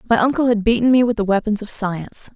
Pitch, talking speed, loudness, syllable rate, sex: 220 Hz, 255 wpm, -18 LUFS, 6.5 syllables/s, female